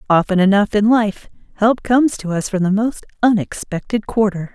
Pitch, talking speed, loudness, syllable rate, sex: 210 Hz, 170 wpm, -17 LUFS, 5.2 syllables/s, female